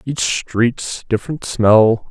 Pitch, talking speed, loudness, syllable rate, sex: 115 Hz, 115 wpm, -16 LUFS, 3.1 syllables/s, male